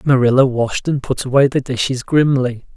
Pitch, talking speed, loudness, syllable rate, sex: 130 Hz, 175 wpm, -16 LUFS, 5.0 syllables/s, male